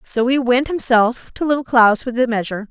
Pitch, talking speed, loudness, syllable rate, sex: 245 Hz, 220 wpm, -17 LUFS, 5.4 syllables/s, female